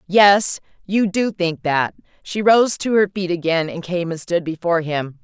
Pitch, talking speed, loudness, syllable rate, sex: 180 Hz, 195 wpm, -19 LUFS, 4.4 syllables/s, female